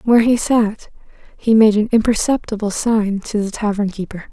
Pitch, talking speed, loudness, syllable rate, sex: 215 Hz, 180 wpm, -17 LUFS, 5.3 syllables/s, female